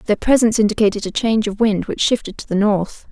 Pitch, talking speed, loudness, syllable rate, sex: 210 Hz, 230 wpm, -17 LUFS, 6.4 syllables/s, female